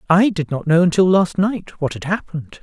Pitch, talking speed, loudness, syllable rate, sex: 170 Hz, 230 wpm, -18 LUFS, 5.3 syllables/s, male